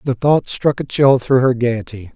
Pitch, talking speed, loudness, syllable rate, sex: 125 Hz, 225 wpm, -16 LUFS, 4.4 syllables/s, male